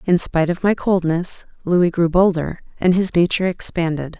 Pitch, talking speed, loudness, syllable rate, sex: 175 Hz, 170 wpm, -18 LUFS, 5.1 syllables/s, female